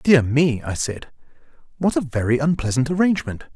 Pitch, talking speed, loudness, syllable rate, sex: 140 Hz, 150 wpm, -20 LUFS, 5.5 syllables/s, male